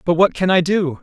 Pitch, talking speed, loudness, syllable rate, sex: 175 Hz, 295 wpm, -16 LUFS, 5.4 syllables/s, male